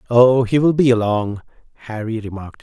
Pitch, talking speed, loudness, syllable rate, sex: 115 Hz, 160 wpm, -17 LUFS, 5.6 syllables/s, male